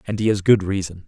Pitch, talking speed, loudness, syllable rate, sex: 100 Hz, 280 wpm, -19 LUFS, 6.5 syllables/s, male